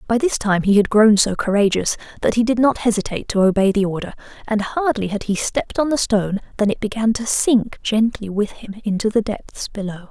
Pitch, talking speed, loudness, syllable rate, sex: 215 Hz, 220 wpm, -19 LUFS, 5.7 syllables/s, female